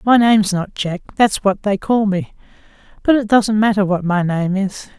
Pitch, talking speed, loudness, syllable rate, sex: 205 Hz, 205 wpm, -16 LUFS, 4.8 syllables/s, female